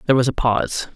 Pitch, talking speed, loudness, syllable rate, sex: 125 Hz, 250 wpm, -19 LUFS, 7.7 syllables/s, female